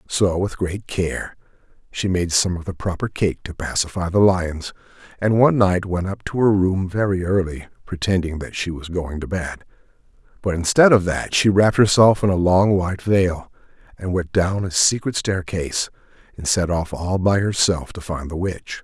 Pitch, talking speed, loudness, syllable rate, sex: 90 Hz, 190 wpm, -20 LUFS, 4.8 syllables/s, male